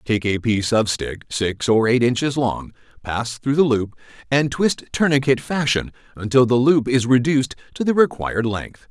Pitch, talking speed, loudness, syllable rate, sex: 125 Hz, 180 wpm, -19 LUFS, 4.9 syllables/s, male